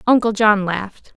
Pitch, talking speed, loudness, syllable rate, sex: 205 Hz, 150 wpm, -17 LUFS, 4.9 syllables/s, female